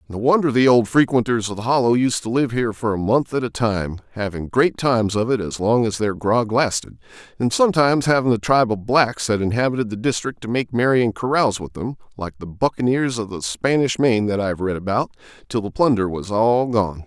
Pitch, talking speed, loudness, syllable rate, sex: 115 Hz, 225 wpm, -20 LUFS, 5.8 syllables/s, male